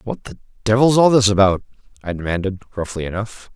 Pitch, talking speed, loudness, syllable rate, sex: 105 Hz, 170 wpm, -18 LUFS, 6.0 syllables/s, male